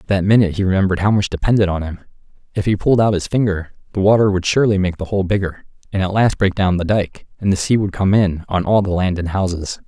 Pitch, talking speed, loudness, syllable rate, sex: 95 Hz, 260 wpm, -17 LUFS, 6.6 syllables/s, male